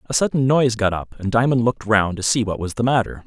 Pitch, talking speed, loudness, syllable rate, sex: 115 Hz, 275 wpm, -19 LUFS, 6.4 syllables/s, male